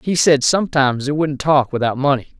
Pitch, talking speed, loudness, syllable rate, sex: 140 Hz, 200 wpm, -16 LUFS, 5.9 syllables/s, male